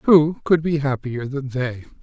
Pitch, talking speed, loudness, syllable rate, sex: 140 Hz, 175 wpm, -21 LUFS, 3.9 syllables/s, male